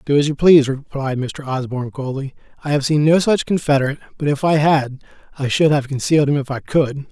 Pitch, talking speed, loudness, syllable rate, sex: 140 Hz, 220 wpm, -18 LUFS, 6.1 syllables/s, male